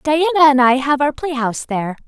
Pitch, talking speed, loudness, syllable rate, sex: 280 Hz, 205 wpm, -15 LUFS, 6.4 syllables/s, female